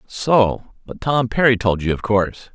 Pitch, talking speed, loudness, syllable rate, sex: 115 Hz, 165 wpm, -18 LUFS, 4.3 syllables/s, male